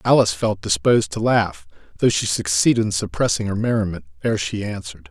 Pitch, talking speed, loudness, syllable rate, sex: 100 Hz, 175 wpm, -20 LUFS, 6.0 syllables/s, male